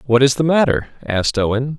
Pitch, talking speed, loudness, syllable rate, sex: 135 Hz, 200 wpm, -17 LUFS, 6.0 syllables/s, male